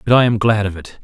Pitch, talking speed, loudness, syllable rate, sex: 105 Hz, 345 wpm, -16 LUFS, 6.5 syllables/s, male